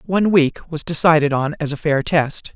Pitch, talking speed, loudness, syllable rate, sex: 155 Hz, 210 wpm, -18 LUFS, 5.2 syllables/s, male